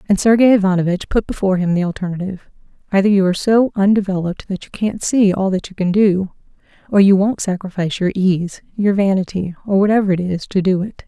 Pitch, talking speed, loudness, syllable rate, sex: 195 Hz, 200 wpm, -16 LUFS, 6.3 syllables/s, female